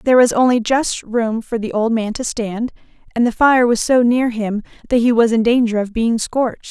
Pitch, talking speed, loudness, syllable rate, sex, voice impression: 230 Hz, 235 wpm, -16 LUFS, 5.1 syllables/s, female, feminine, adult-like, slightly soft, slightly muffled, sincere, slightly calm, friendly, slightly kind